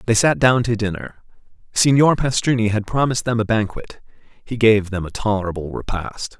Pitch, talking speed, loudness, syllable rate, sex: 110 Hz, 170 wpm, -19 LUFS, 5.3 syllables/s, male